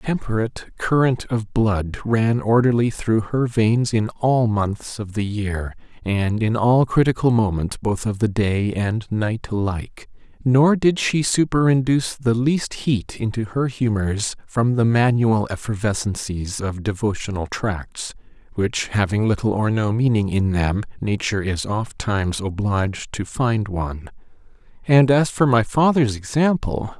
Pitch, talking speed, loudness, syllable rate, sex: 110 Hz, 145 wpm, -20 LUFS, 4.2 syllables/s, male